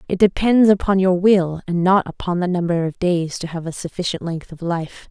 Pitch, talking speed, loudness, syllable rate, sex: 180 Hz, 225 wpm, -19 LUFS, 5.1 syllables/s, female